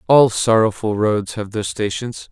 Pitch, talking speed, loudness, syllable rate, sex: 110 Hz, 155 wpm, -18 LUFS, 4.2 syllables/s, male